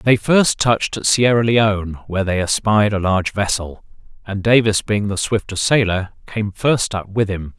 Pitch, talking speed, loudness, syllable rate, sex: 105 Hz, 180 wpm, -17 LUFS, 5.1 syllables/s, male